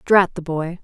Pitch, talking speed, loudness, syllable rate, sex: 175 Hz, 215 wpm, -19 LUFS, 4.1 syllables/s, female